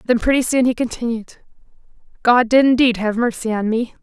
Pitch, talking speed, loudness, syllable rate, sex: 235 Hz, 180 wpm, -17 LUFS, 5.5 syllables/s, female